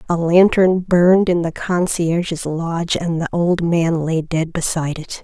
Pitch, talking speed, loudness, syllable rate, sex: 170 Hz, 170 wpm, -17 LUFS, 4.4 syllables/s, female